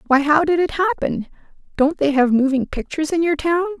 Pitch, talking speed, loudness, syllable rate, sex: 310 Hz, 205 wpm, -18 LUFS, 5.7 syllables/s, female